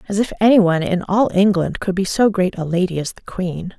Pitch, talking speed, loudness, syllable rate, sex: 190 Hz, 255 wpm, -18 LUFS, 5.7 syllables/s, female